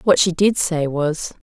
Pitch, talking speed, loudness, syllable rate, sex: 170 Hz, 210 wpm, -18 LUFS, 3.9 syllables/s, female